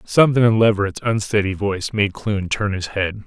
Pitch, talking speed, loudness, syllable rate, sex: 105 Hz, 185 wpm, -19 LUFS, 5.5 syllables/s, male